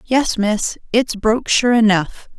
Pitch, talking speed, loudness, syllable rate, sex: 225 Hz, 150 wpm, -16 LUFS, 3.9 syllables/s, female